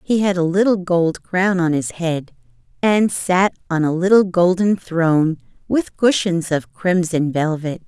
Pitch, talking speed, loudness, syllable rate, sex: 175 Hz, 160 wpm, -18 LUFS, 4.1 syllables/s, female